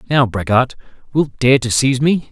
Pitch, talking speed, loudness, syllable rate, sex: 130 Hz, 180 wpm, -16 LUFS, 5.1 syllables/s, male